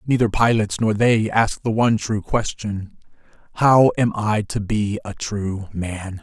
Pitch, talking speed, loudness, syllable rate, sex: 105 Hz, 165 wpm, -20 LUFS, 4.2 syllables/s, male